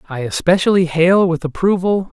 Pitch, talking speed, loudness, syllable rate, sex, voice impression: 175 Hz, 135 wpm, -15 LUFS, 5.1 syllables/s, male, masculine, adult-like, bright, slightly soft, clear, fluent, slightly cool, refreshing, friendly, lively, kind